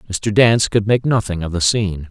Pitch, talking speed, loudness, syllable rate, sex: 105 Hz, 230 wpm, -16 LUFS, 5.8 syllables/s, male